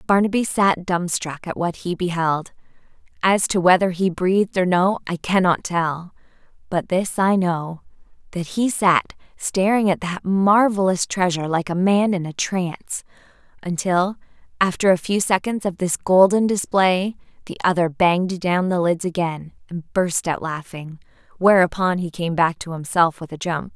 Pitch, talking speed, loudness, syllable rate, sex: 180 Hz, 165 wpm, -20 LUFS, 4.5 syllables/s, female